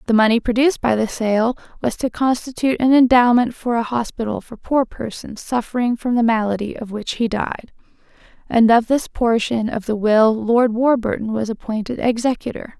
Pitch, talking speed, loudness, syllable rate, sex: 235 Hz, 175 wpm, -18 LUFS, 5.2 syllables/s, female